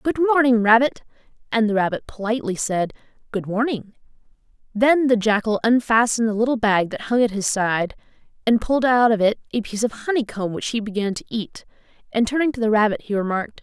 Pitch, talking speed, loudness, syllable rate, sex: 225 Hz, 190 wpm, -20 LUFS, 6.0 syllables/s, female